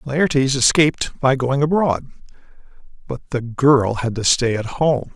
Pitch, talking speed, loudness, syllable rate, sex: 135 Hz, 150 wpm, -18 LUFS, 4.2 syllables/s, male